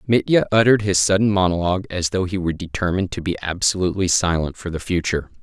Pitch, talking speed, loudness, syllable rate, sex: 95 Hz, 190 wpm, -20 LUFS, 7.0 syllables/s, male